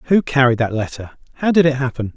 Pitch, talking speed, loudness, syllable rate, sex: 135 Hz, 220 wpm, -17 LUFS, 5.9 syllables/s, male